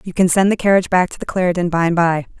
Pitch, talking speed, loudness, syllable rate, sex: 180 Hz, 300 wpm, -16 LUFS, 7.3 syllables/s, female